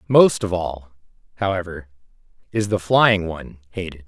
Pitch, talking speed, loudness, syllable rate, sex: 90 Hz, 130 wpm, -20 LUFS, 4.8 syllables/s, male